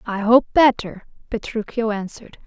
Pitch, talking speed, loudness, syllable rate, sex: 220 Hz, 120 wpm, -19 LUFS, 5.0 syllables/s, female